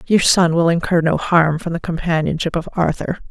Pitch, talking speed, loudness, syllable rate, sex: 165 Hz, 200 wpm, -17 LUFS, 5.3 syllables/s, female